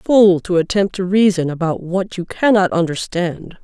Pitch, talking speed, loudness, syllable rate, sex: 180 Hz, 165 wpm, -17 LUFS, 4.5 syllables/s, female